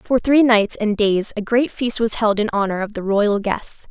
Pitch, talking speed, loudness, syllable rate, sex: 215 Hz, 245 wpm, -18 LUFS, 4.5 syllables/s, female